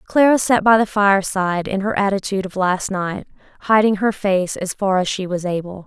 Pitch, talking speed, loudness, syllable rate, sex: 195 Hz, 205 wpm, -18 LUFS, 5.4 syllables/s, female